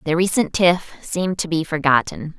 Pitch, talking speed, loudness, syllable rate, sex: 170 Hz, 175 wpm, -19 LUFS, 4.7 syllables/s, female